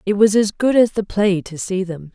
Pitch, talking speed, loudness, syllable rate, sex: 195 Hz, 280 wpm, -18 LUFS, 4.9 syllables/s, female